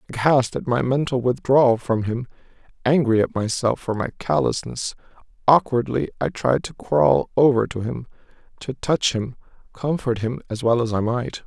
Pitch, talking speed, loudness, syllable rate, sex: 125 Hz, 160 wpm, -21 LUFS, 4.8 syllables/s, male